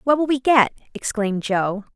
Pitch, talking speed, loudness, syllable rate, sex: 230 Hz, 185 wpm, -20 LUFS, 5.2 syllables/s, female